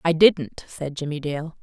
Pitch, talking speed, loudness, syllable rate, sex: 160 Hz, 185 wpm, -22 LUFS, 4.1 syllables/s, female